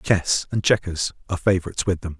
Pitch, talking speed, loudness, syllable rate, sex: 90 Hz, 190 wpm, -22 LUFS, 6.1 syllables/s, male